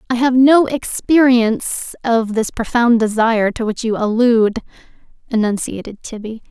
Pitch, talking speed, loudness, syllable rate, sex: 230 Hz, 130 wpm, -15 LUFS, 4.8 syllables/s, female